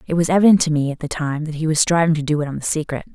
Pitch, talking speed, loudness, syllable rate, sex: 155 Hz, 345 wpm, -18 LUFS, 7.5 syllables/s, female